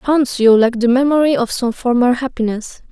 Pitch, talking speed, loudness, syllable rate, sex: 250 Hz, 185 wpm, -15 LUFS, 5.0 syllables/s, female